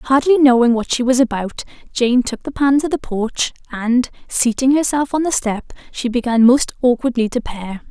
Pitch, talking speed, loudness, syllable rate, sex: 250 Hz, 190 wpm, -17 LUFS, 4.8 syllables/s, female